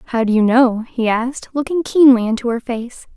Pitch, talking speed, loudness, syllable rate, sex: 245 Hz, 210 wpm, -16 LUFS, 5.1 syllables/s, female